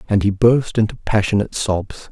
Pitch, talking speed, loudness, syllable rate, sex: 105 Hz, 170 wpm, -18 LUFS, 5.2 syllables/s, male